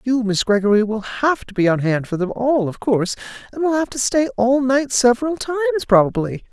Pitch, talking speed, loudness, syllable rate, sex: 240 Hz, 220 wpm, -18 LUFS, 5.7 syllables/s, female